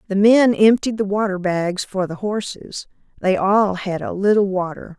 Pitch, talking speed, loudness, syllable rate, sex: 200 Hz, 180 wpm, -18 LUFS, 4.5 syllables/s, female